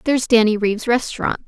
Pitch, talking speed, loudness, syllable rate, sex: 230 Hz, 165 wpm, -18 LUFS, 6.7 syllables/s, female